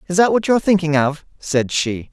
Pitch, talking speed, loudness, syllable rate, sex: 165 Hz, 225 wpm, -17 LUFS, 5.5 syllables/s, male